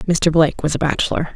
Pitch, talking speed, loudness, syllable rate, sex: 160 Hz, 220 wpm, -17 LUFS, 6.4 syllables/s, female